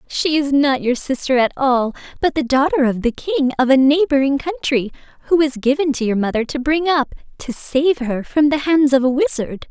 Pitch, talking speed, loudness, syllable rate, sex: 275 Hz, 215 wpm, -17 LUFS, 5.0 syllables/s, female